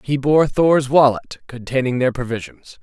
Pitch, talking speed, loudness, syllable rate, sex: 135 Hz, 150 wpm, -17 LUFS, 4.5 syllables/s, male